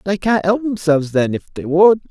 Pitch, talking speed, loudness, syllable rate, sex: 180 Hz, 230 wpm, -16 LUFS, 5.5 syllables/s, male